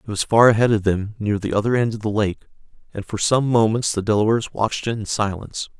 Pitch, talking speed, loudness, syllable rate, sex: 110 Hz, 240 wpm, -20 LUFS, 6.2 syllables/s, male